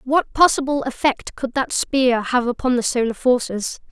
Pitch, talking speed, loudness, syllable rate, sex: 255 Hz, 170 wpm, -19 LUFS, 4.6 syllables/s, female